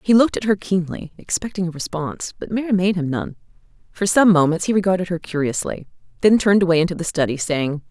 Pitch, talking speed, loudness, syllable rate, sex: 180 Hz, 205 wpm, -19 LUFS, 6.3 syllables/s, female